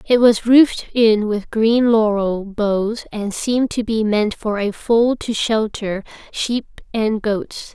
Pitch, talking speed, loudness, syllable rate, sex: 220 Hz, 165 wpm, -18 LUFS, 3.6 syllables/s, female